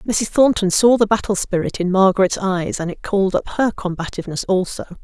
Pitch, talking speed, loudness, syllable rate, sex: 195 Hz, 190 wpm, -18 LUFS, 5.6 syllables/s, female